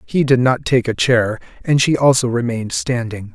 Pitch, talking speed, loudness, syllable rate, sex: 125 Hz, 195 wpm, -16 LUFS, 5.0 syllables/s, male